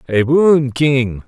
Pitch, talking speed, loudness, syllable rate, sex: 135 Hz, 140 wpm, -14 LUFS, 2.8 syllables/s, male